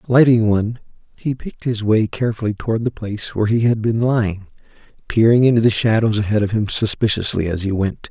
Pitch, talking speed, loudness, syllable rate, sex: 110 Hz, 195 wpm, -18 LUFS, 6.2 syllables/s, male